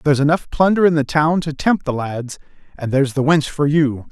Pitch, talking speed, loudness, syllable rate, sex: 145 Hz, 235 wpm, -17 LUFS, 5.5 syllables/s, male